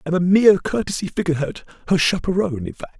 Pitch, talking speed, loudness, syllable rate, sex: 170 Hz, 180 wpm, -19 LUFS, 7.0 syllables/s, male